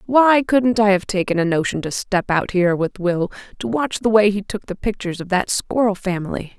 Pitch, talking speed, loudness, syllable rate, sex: 200 Hz, 230 wpm, -19 LUFS, 5.4 syllables/s, female